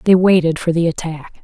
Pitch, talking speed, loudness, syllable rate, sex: 170 Hz, 210 wpm, -15 LUFS, 5.8 syllables/s, female